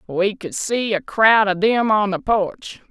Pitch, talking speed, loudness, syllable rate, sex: 205 Hz, 205 wpm, -18 LUFS, 3.7 syllables/s, female